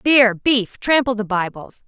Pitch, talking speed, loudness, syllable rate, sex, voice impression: 225 Hz, 160 wpm, -17 LUFS, 3.8 syllables/s, female, feminine, adult-like, tensed, powerful, bright, clear, fluent, intellectual, lively, intense, sharp